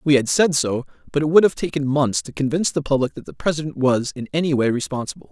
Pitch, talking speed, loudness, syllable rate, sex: 145 Hz, 250 wpm, -20 LUFS, 6.6 syllables/s, male